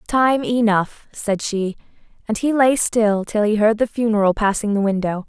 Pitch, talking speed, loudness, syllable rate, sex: 215 Hz, 180 wpm, -19 LUFS, 4.6 syllables/s, female